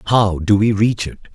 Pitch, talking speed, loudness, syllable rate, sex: 100 Hz, 225 wpm, -16 LUFS, 5.0 syllables/s, male